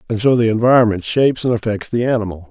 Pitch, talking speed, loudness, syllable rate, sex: 110 Hz, 215 wpm, -16 LUFS, 6.9 syllables/s, male